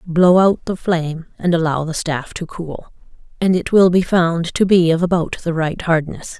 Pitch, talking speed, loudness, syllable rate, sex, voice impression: 170 Hz, 205 wpm, -17 LUFS, 4.6 syllables/s, female, feminine, adult-like, slightly relaxed, powerful, slightly muffled, raspy, slightly friendly, unique, lively, slightly strict, slightly intense, sharp